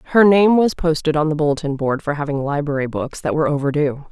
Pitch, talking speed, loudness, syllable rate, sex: 150 Hz, 220 wpm, -18 LUFS, 6.3 syllables/s, female